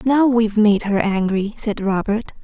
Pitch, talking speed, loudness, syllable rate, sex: 215 Hz, 170 wpm, -18 LUFS, 4.7 syllables/s, female